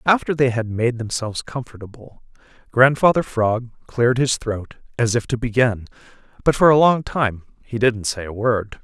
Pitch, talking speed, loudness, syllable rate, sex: 120 Hz, 170 wpm, -19 LUFS, 4.7 syllables/s, male